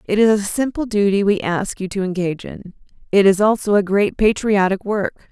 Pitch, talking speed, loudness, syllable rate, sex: 200 Hz, 205 wpm, -18 LUFS, 5.3 syllables/s, female